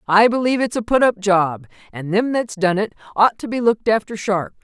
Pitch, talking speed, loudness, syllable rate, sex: 210 Hz, 235 wpm, -18 LUFS, 5.6 syllables/s, female